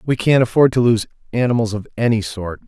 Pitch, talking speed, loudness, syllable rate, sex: 115 Hz, 200 wpm, -17 LUFS, 6.1 syllables/s, male